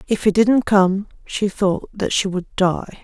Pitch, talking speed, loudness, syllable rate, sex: 200 Hz, 200 wpm, -19 LUFS, 3.8 syllables/s, female